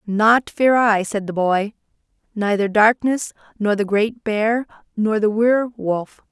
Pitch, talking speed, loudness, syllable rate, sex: 215 Hz, 150 wpm, -19 LUFS, 3.9 syllables/s, female